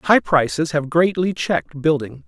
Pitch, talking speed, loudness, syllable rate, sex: 155 Hz, 160 wpm, -19 LUFS, 4.5 syllables/s, male